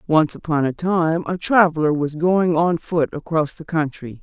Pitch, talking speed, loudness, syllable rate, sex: 160 Hz, 185 wpm, -19 LUFS, 4.5 syllables/s, female